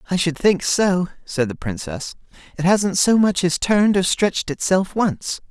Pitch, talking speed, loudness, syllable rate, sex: 180 Hz, 185 wpm, -19 LUFS, 4.6 syllables/s, male